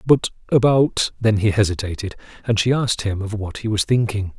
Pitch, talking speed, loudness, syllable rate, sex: 110 Hz, 190 wpm, -20 LUFS, 5.4 syllables/s, male